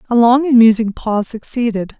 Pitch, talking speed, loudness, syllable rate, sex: 230 Hz, 180 wpm, -14 LUFS, 5.6 syllables/s, female